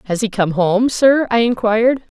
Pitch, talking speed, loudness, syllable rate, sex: 220 Hz, 190 wpm, -15 LUFS, 4.8 syllables/s, female